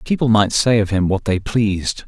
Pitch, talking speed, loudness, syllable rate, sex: 105 Hz, 230 wpm, -17 LUFS, 5.1 syllables/s, male